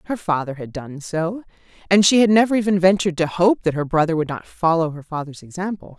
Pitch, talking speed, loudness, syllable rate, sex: 175 Hz, 220 wpm, -19 LUFS, 6.0 syllables/s, female